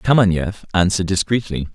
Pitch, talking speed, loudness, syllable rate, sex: 95 Hz, 105 wpm, -18 LUFS, 6.1 syllables/s, male